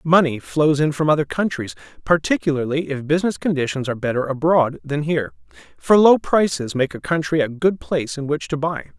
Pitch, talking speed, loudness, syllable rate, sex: 150 Hz, 185 wpm, -19 LUFS, 5.7 syllables/s, male